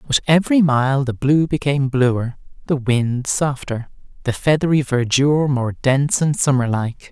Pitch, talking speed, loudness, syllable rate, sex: 135 Hz, 150 wpm, -18 LUFS, 4.6 syllables/s, male